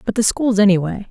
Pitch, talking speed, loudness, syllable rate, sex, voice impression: 210 Hz, 220 wpm, -16 LUFS, 5.9 syllables/s, female, feminine, adult-like, relaxed, slightly weak, soft, muffled, intellectual, calm, reassuring, elegant, kind, modest